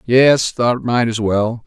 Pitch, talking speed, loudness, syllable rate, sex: 120 Hz, 180 wpm, -16 LUFS, 3.2 syllables/s, male